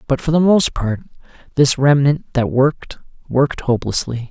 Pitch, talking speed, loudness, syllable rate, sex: 135 Hz, 155 wpm, -16 LUFS, 5.3 syllables/s, male